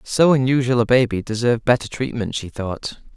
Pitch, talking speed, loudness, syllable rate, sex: 120 Hz, 170 wpm, -19 LUFS, 5.4 syllables/s, male